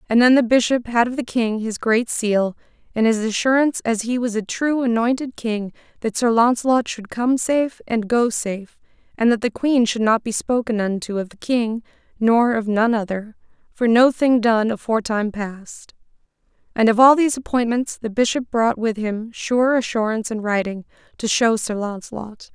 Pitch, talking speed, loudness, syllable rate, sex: 230 Hz, 190 wpm, -19 LUFS, 5.0 syllables/s, female